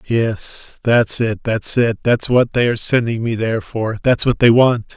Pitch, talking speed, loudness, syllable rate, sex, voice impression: 115 Hz, 205 wpm, -16 LUFS, 4.4 syllables/s, male, masculine, adult-like, slightly bright, slightly soft, slightly halting, sincere, calm, reassuring, slightly lively, slightly sharp